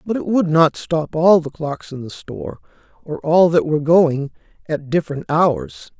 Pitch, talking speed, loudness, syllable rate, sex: 160 Hz, 170 wpm, -17 LUFS, 4.6 syllables/s, male